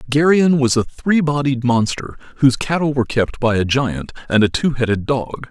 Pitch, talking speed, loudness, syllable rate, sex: 130 Hz, 195 wpm, -17 LUFS, 5.1 syllables/s, male